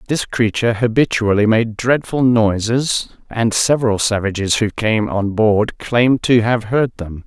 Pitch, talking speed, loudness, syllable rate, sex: 115 Hz, 150 wpm, -16 LUFS, 4.4 syllables/s, male